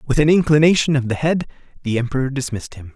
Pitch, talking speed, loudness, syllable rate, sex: 140 Hz, 205 wpm, -18 LUFS, 7.0 syllables/s, male